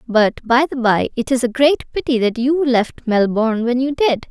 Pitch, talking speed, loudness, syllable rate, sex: 250 Hz, 225 wpm, -17 LUFS, 4.8 syllables/s, female